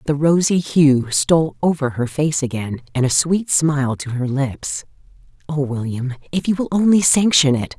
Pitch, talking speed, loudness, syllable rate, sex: 145 Hz, 175 wpm, -18 LUFS, 4.7 syllables/s, female